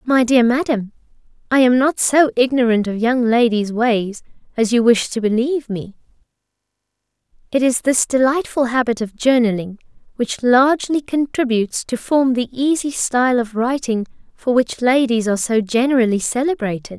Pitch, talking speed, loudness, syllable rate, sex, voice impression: 245 Hz, 150 wpm, -17 LUFS, 5.0 syllables/s, female, feminine, slightly young, tensed, slightly powerful, bright, slightly soft, clear, slightly halting, slightly nasal, cute, calm, friendly, reassuring, slightly elegant, lively, kind